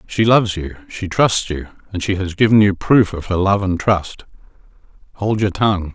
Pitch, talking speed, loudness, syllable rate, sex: 95 Hz, 200 wpm, -17 LUFS, 5.1 syllables/s, male